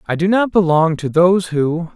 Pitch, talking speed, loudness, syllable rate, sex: 175 Hz, 215 wpm, -15 LUFS, 5.0 syllables/s, male